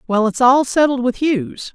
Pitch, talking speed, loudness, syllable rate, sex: 250 Hz, 205 wpm, -16 LUFS, 5.0 syllables/s, female